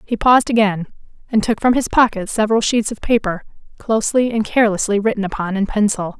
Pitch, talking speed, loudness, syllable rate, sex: 215 Hz, 185 wpm, -17 LUFS, 6.2 syllables/s, female